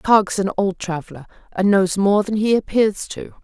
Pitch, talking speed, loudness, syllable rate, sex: 195 Hz, 190 wpm, -19 LUFS, 4.6 syllables/s, female